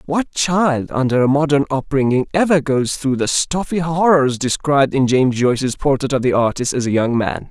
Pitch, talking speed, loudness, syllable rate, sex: 140 Hz, 190 wpm, -17 LUFS, 5.1 syllables/s, male